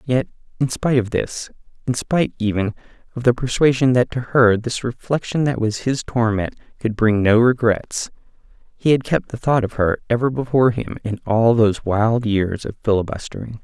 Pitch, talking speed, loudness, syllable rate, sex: 120 Hz, 180 wpm, -19 LUFS, 5.2 syllables/s, male